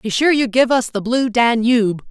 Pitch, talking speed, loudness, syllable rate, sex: 235 Hz, 230 wpm, -16 LUFS, 4.9 syllables/s, female